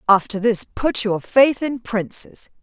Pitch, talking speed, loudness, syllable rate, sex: 225 Hz, 160 wpm, -19 LUFS, 4.0 syllables/s, female